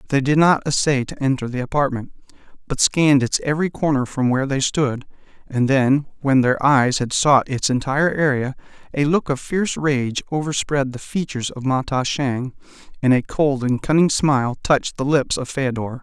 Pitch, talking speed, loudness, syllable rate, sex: 135 Hz, 185 wpm, -19 LUFS, 5.2 syllables/s, male